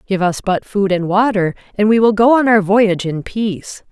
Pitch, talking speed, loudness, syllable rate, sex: 200 Hz, 230 wpm, -15 LUFS, 5.1 syllables/s, female